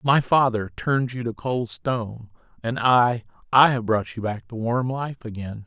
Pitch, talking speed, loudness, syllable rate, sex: 120 Hz, 180 wpm, -23 LUFS, 4.5 syllables/s, male